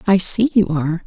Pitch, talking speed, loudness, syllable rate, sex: 185 Hz, 225 wpm, -16 LUFS, 5.6 syllables/s, female